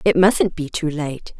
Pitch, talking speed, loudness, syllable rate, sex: 165 Hz, 215 wpm, -20 LUFS, 4.1 syllables/s, female